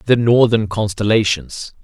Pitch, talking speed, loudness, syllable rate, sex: 110 Hz, 100 wpm, -16 LUFS, 4.0 syllables/s, male